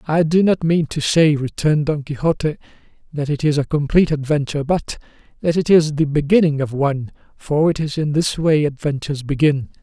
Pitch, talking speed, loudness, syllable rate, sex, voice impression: 150 Hz, 190 wpm, -18 LUFS, 5.6 syllables/s, male, masculine, slightly middle-aged, slightly thick, slightly muffled, sincere, calm, slightly reassuring, slightly kind